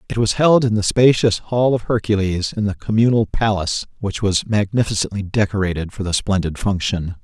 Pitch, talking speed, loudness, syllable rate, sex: 105 Hz, 175 wpm, -18 LUFS, 5.4 syllables/s, male